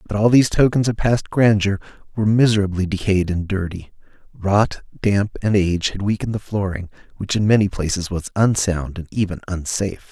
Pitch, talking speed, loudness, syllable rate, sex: 100 Hz, 170 wpm, -19 LUFS, 5.6 syllables/s, male